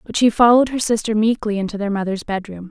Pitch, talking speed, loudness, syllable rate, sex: 215 Hz, 220 wpm, -18 LUFS, 6.5 syllables/s, female